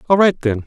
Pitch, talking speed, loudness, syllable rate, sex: 145 Hz, 270 wpm, -16 LUFS, 6.1 syllables/s, male